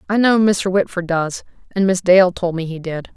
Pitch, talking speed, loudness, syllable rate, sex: 185 Hz, 230 wpm, -17 LUFS, 4.9 syllables/s, female